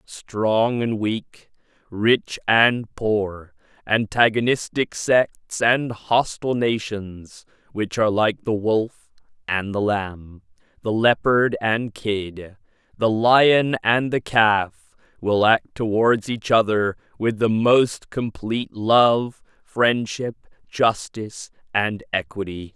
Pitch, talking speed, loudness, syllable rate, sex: 110 Hz, 105 wpm, -21 LUFS, 3.1 syllables/s, male